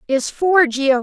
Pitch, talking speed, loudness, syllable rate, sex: 290 Hz, 175 wpm, -16 LUFS, 3.3 syllables/s, female